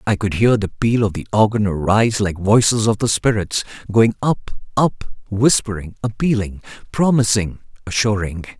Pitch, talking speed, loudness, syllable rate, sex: 105 Hz, 145 wpm, -18 LUFS, 4.9 syllables/s, male